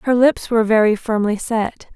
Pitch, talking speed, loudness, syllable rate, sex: 225 Hz, 185 wpm, -17 LUFS, 5.1 syllables/s, female